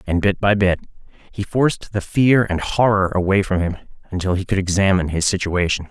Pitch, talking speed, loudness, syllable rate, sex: 95 Hz, 195 wpm, -19 LUFS, 5.7 syllables/s, male